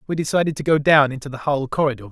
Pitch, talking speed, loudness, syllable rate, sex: 140 Hz, 255 wpm, -19 LUFS, 7.2 syllables/s, male